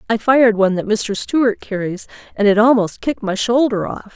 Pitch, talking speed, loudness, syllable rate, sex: 220 Hz, 200 wpm, -16 LUFS, 5.7 syllables/s, female